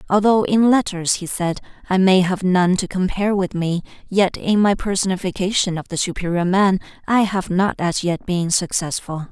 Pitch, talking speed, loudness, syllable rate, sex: 185 Hz, 180 wpm, -19 LUFS, 5.0 syllables/s, female